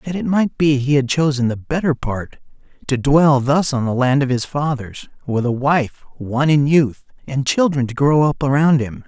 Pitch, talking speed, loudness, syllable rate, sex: 140 Hz, 210 wpm, -17 LUFS, 4.7 syllables/s, male